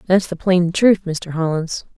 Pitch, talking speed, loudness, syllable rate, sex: 175 Hz, 180 wpm, -18 LUFS, 4.1 syllables/s, female